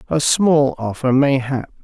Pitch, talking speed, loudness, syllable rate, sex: 140 Hz, 130 wpm, -17 LUFS, 3.8 syllables/s, male